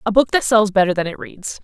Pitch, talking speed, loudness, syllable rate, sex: 210 Hz, 295 wpm, -17 LUFS, 6.0 syllables/s, female